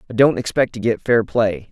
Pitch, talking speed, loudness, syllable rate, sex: 115 Hz, 245 wpm, -18 LUFS, 5.4 syllables/s, male